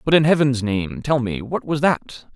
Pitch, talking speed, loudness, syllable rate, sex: 135 Hz, 230 wpm, -20 LUFS, 4.5 syllables/s, male